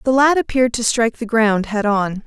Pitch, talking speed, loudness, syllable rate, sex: 230 Hz, 240 wpm, -17 LUFS, 5.6 syllables/s, female